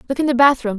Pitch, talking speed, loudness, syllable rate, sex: 255 Hz, 305 wpm, -15 LUFS, 7.6 syllables/s, female